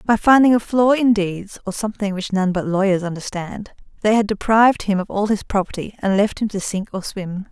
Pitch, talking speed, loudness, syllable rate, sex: 205 Hz, 225 wpm, -19 LUFS, 5.5 syllables/s, female